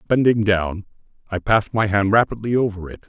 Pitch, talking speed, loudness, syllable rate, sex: 105 Hz, 175 wpm, -19 LUFS, 5.8 syllables/s, male